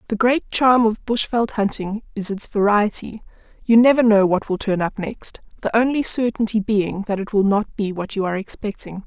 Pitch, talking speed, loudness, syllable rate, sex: 210 Hz, 190 wpm, -19 LUFS, 5.1 syllables/s, female